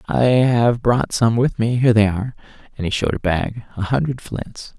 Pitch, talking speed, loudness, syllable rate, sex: 115 Hz, 190 wpm, -18 LUFS, 5.1 syllables/s, male